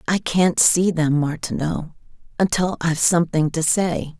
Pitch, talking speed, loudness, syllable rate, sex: 165 Hz, 145 wpm, -19 LUFS, 4.5 syllables/s, female